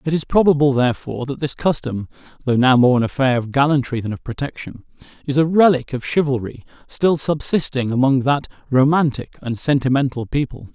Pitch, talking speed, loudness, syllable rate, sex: 135 Hz, 170 wpm, -18 LUFS, 5.7 syllables/s, male